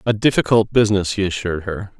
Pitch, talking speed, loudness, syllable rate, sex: 100 Hz, 180 wpm, -18 LUFS, 6.6 syllables/s, male